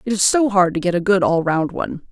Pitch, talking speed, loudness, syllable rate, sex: 190 Hz, 310 wpm, -17 LUFS, 6.2 syllables/s, female